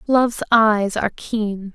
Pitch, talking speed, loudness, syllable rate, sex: 220 Hz, 140 wpm, -19 LUFS, 4.0 syllables/s, female